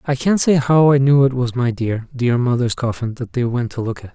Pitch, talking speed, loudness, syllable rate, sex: 130 Hz, 275 wpm, -17 LUFS, 5.3 syllables/s, male